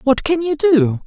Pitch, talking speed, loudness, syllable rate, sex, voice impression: 325 Hz, 225 wpm, -16 LUFS, 4.2 syllables/s, female, very feminine, very adult-like, thin, tensed, slightly weak, slightly dark, soft, clear, fluent, slightly raspy, cute, very intellectual, refreshing, very sincere, calm, very friendly, reassuring, unique, elegant, slightly wild, sweet, lively, kind, modest, slightly light